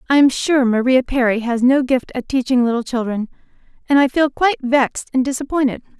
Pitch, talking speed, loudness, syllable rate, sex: 260 Hz, 190 wpm, -17 LUFS, 5.9 syllables/s, female